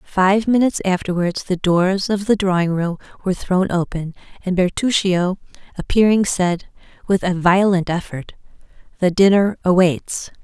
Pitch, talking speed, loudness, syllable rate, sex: 185 Hz, 130 wpm, -18 LUFS, 4.5 syllables/s, female